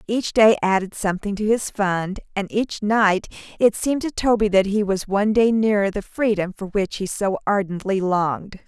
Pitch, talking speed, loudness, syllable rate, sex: 205 Hz, 195 wpm, -21 LUFS, 5.0 syllables/s, female